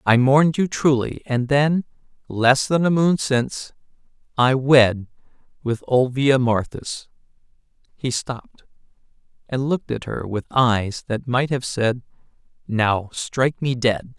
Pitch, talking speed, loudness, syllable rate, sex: 130 Hz, 135 wpm, -20 LUFS, 4.0 syllables/s, male